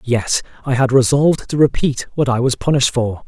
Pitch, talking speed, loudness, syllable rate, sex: 130 Hz, 200 wpm, -16 LUFS, 5.6 syllables/s, male